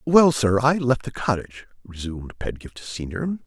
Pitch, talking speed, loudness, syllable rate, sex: 120 Hz, 155 wpm, -23 LUFS, 4.8 syllables/s, male